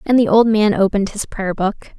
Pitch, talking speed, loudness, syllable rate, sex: 210 Hz, 240 wpm, -16 LUFS, 6.0 syllables/s, female